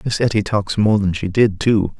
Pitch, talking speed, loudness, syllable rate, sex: 105 Hz, 240 wpm, -17 LUFS, 4.8 syllables/s, male